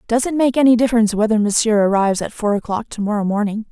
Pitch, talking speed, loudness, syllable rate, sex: 220 Hz, 225 wpm, -17 LUFS, 7.1 syllables/s, female